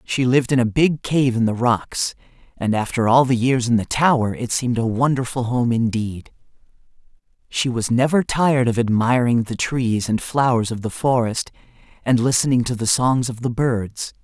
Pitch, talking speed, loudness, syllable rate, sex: 120 Hz, 185 wpm, -19 LUFS, 4.9 syllables/s, male